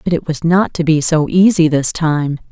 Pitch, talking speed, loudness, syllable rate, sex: 160 Hz, 240 wpm, -14 LUFS, 4.7 syllables/s, female